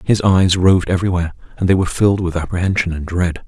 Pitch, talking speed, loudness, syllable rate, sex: 90 Hz, 205 wpm, -16 LUFS, 7.1 syllables/s, male